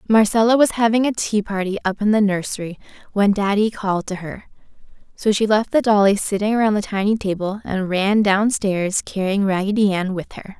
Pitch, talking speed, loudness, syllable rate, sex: 205 Hz, 195 wpm, -19 LUFS, 5.4 syllables/s, female